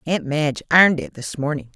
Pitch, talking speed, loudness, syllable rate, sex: 150 Hz, 205 wpm, -19 LUFS, 6.6 syllables/s, female